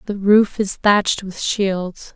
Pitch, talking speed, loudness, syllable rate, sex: 200 Hz, 165 wpm, -18 LUFS, 3.5 syllables/s, female